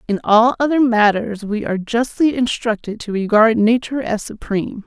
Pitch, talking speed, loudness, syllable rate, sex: 225 Hz, 160 wpm, -17 LUFS, 5.2 syllables/s, female